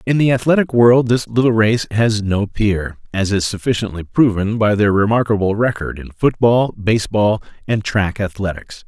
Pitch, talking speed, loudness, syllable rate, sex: 110 Hz, 160 wpm, -16 LUFS, 4.8 syllables/s, male